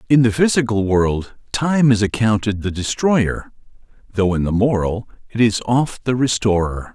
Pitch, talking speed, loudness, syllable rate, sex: 110 Hz, 155 wpm, -18 LUFS, 4.6 syllables/s, male